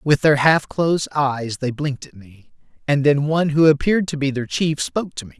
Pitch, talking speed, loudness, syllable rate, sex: 140 Hz, 235 wpm, -19 LUFS, 5.4 syllables/s, male